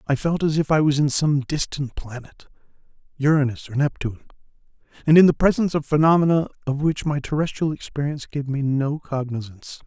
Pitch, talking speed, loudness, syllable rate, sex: 145 Hz, 165 wpm, -21 LUFS, 5.9 syllables/s, male